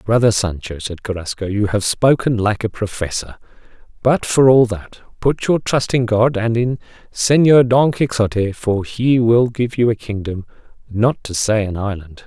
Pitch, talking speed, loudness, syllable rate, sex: 110 Hz, 175 wpm, -17 LUFS, 4.5 syllables/s, male